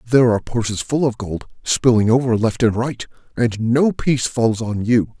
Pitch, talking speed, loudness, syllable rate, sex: 115 Hz, 195 wpm, -18 LUFS, 5.1 syllables/s, male